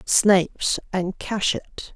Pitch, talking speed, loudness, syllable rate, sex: 195 Hz, 90 wpm, -22 LUFS, 4.6 syllables/s, female